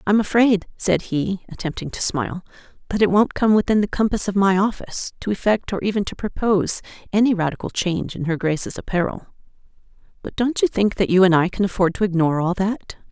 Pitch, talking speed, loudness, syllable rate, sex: 195 Hz, 200 wpm, -20 LUFS, 6.0 syllables/s, female